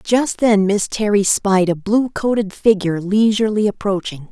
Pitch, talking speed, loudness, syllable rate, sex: 205 Hz, 155 wpm, -17 LUFS, 4.8 syllables/s, female